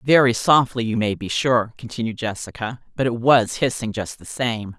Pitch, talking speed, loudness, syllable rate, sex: 120 Hz, 190 wpm, -21 LUFS, 4.9 syllables/s, female